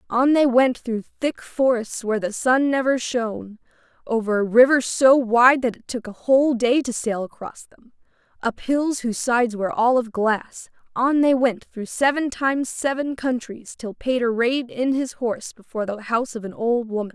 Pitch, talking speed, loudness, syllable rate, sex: 240 Hz, 190 wpm, -21 LUFS, 4.9 syllables/s, female